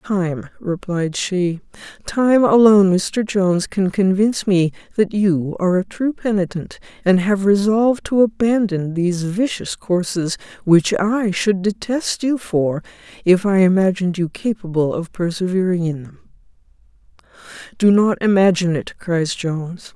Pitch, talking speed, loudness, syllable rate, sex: 190 Hz, 135 wpm, -18 LUFS, 4.5 syllables/s, female